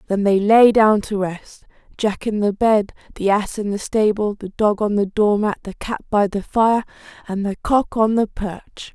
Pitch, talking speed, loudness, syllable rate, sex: 210 Hz, 210 wpm, -19 LUFS, 4.3 syllables/s, female